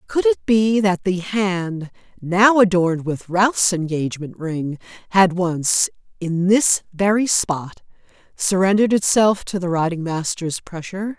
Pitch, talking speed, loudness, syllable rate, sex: 185 Hz, 135 wpm, -19 LUFS, 4.1 syllables/s, female